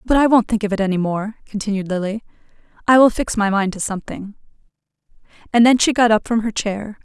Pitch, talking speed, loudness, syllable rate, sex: 215 Hz, 215 wpm, -18 LUFS, 5.9 syllables/s, female